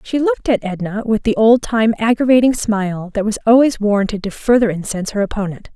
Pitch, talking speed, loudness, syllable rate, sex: 220 Hz, 200 wpm, -16 LUFS, 6.0 syllables/s, female